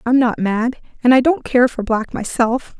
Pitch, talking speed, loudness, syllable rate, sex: 240 Hz, 215 wpm, -17 LUFS, 4.5 syllables/s, female